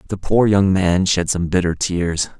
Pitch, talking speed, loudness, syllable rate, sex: 90 Hz, 200 wpm, -17 LUFS, 4.3 syllables/s, male